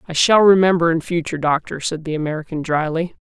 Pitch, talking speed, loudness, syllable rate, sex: 165 Hz, 185 wpm, -18 LUFS, 6.3 syllables/s, female